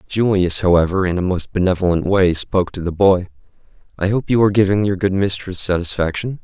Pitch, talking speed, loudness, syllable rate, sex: 95 Hz, 175 wpm, -17 LUFS, 5.9 syllables/s, male